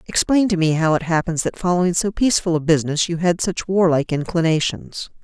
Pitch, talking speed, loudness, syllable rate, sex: 170 Hz, 195 wpm, -19 LUFS, 6.0 syllables/s, female